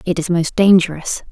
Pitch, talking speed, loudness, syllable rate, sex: 175 Hz, 185 wpm, -15 LUFS, 5.3 syllables/s, female